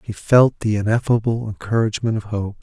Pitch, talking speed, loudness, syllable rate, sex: 110 Hz, 160 wpm, -19 LUFS, 5.8 syllables/s, male